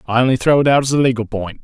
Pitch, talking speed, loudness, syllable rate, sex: 125 Hz, 330 wpm, -15 LUFS, 7.5 syllables/s, male